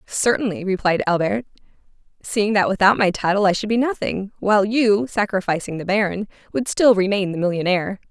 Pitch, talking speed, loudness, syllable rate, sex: 200 Hz, 165 wpm, -19 LUFS, 5.6 syllables/s, female